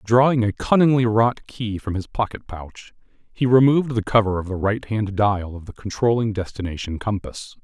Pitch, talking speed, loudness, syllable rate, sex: 110 Hz, 175 wpm, -21 LUFS, 5.0 syllables/s, male